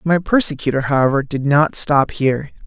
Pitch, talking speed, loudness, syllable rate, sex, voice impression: 145 Hz, 160 wpm, -16 LUFS, 5.4 syllables/s, male, masculine, slightly young, slightly adult-like, slightly thick, tensed, slightly weak, very bright, slightly soft, very clear, fluent, slightly cool, intellectual, very refreshing, sincere, calm, very friendly, reassuring, slightly unique, wild, slightly sweet, very lively, kind